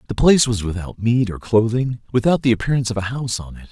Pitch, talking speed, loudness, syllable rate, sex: 115 Hz, 240 wpm, -19 LUFS, 6.9 syllables/s, male